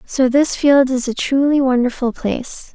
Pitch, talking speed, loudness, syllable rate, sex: 265 Hz, 175 wpm, -16 LUFS, 4.5 syllables/s, female